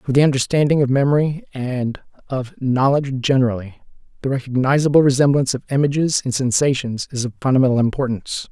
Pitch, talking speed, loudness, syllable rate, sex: 135 Hz, 140 wpm, -18 LUFS, 6.4 syllables/s, male